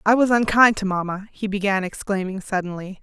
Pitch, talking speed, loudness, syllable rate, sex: 200 Hz, 180 wpm, -21 LUFS, 5.6 syllables/s, female